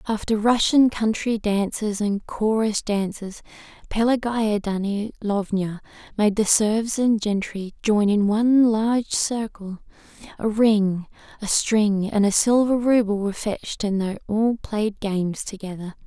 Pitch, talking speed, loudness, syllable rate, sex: 210 Hz, 130 wpm, -22 LUFS, 4.1 syllables/s, female